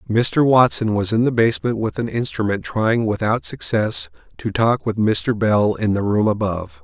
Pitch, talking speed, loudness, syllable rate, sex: 110 Hz, 185 wpm, -19 LUFS, 4.7 syllables/s, male